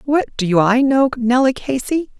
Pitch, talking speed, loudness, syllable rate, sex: 255 Hz, 165 wpm, -16 LUFS, 4.4 syllables/s, female